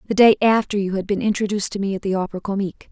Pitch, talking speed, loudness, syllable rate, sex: 200 Hz, 270 wpm, -20 LUFS, 7.9 syllables/s, female